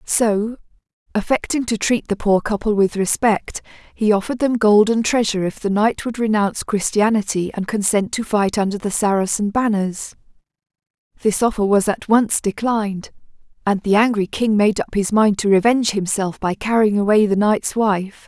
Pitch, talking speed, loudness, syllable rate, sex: 210 Hz, 170 wpm, -18 LUFS, 5.0 syllables/s, female